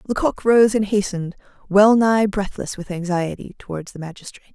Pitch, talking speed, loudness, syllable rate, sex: 200 Hz, 160 wpm, -19 LUFS, 5.4 syllables/s, female